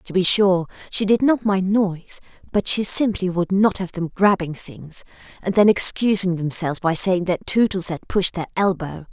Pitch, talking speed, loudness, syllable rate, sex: 185 Hz, 190 wpm, -19 LUFS, 4.8 syllables/s, female